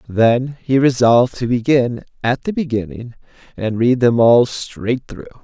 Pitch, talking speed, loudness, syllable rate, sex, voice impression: 120 Hz, 155 wpm, -16 LUFS, 4.2 syllables/s, male, very masculine, very adult-like, thick, slightly tensed, powerful, slightly bright, soft, slightly clear, fluent, slightly raspy, cool, intellectual, refreshing, slightly sincere, calm, slightly mature, slightly friendly, slightly reassuring, very unique, elegant, slightly wild, sweet, lively, kind, intense, sharp